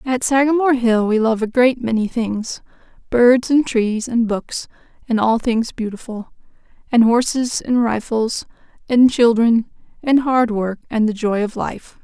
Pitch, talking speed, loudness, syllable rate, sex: 235 Hz, 155 wpm, -17 LUFS, 4.3 syllables/s, female